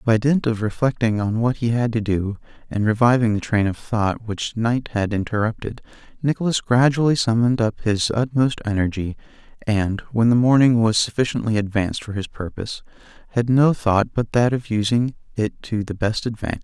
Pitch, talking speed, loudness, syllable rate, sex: 115 Hz, 175 wpm, -20 LUFS, 5.3 syllables/s, male